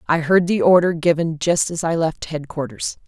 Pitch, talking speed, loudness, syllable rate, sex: 160 Hz, 195 wpm, -19 LUFS, 4.9 syllables/s, female